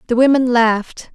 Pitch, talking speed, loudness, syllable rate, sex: 240 Hz, 155 wpm, -14 LUFS, 5.5 syllables/s, female